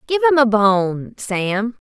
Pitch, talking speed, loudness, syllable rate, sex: 230 Hz, 130 wpm, -17 LUFS, 3.4 syllables/s, female